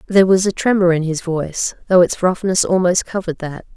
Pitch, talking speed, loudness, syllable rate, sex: 180 Hz, 205 wpm, -16 LUFS, 5.9 syllables/s, female